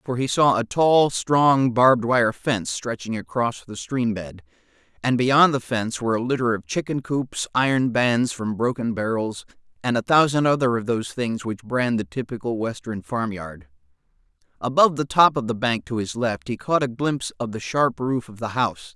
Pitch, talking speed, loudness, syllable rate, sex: 120 Hz, 200 wpm, -22 LUFS, 5.0 syllables/s, male